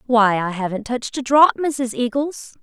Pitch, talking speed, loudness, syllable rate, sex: 245 Hz, 185 wpm, -19 LUFS, 4.6 syllables/s, female